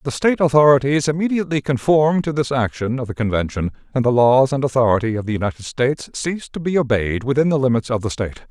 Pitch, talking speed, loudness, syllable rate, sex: 130 Hz, 210 wpm, -18 LUFS, 6.8 syllables/s, male